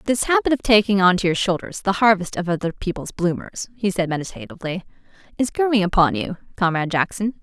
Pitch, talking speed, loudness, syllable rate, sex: 195 Hz, 185 wpm, -20 LUFS, 6.3 syllables/s, female